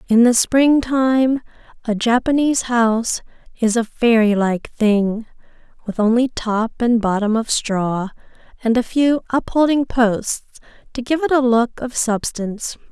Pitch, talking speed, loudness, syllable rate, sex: 235 Hz, 140 wpm, -18 LUFS, 4.2 syllables/s, female